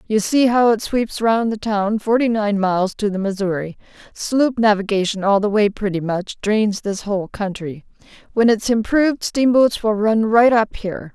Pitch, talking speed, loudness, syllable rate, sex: 215 Hz, 180 wpm, -18 LUFS, 4.8 syllables/s, female